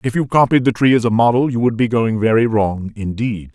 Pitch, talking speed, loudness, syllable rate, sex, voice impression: 115 Hz, 255 wpm, -16 LUFS, 5.6 syllables/s, male, very masculine, old, very thick, tensed, very powerful, slightly bright, soft, slightly muffled, fluent, slightly raspy, very cool, intellectual, sincere, very calm, very mature, very friendly, very reassuring, unique, elegant, wild, sweet, lively, kind, slightly intense, slightly modest